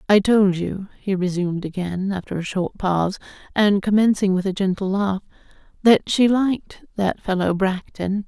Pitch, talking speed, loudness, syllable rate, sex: 195 Hz, 160 wpm, -21 LUFS, 4.8 syllables/s, female